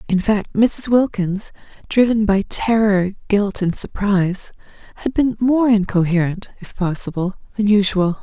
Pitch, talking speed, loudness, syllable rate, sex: 205 Hz, 130 wpm, -18 LUFS, 4.4 syllables/s, female